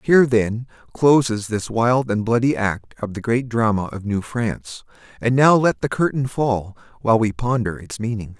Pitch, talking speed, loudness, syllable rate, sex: 115 Hz, 185 wpm, -20 LUFS, 4.8 syllables/s, male